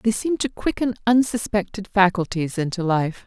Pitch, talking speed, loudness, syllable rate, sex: 205 Hz, 145 wpm, -22 LUFS, 5.1 syllables/s, female